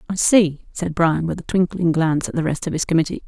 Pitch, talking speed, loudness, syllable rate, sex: 170 Hz, 255 wpm, -19 LUFS, 6.0 syllables/s, female